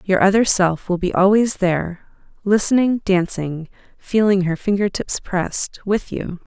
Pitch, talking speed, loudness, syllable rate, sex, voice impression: 195 Hz, 130 wpm, -18 LUFS, 4.4 syllables/s, female, feminine, adult-like, slightly soft, calm, reassuring, kind